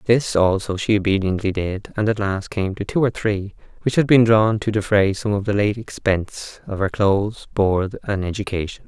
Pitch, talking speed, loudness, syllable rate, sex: 100 Hz, 205 wpm, -20 LUFS, 5.0 syllables/s, male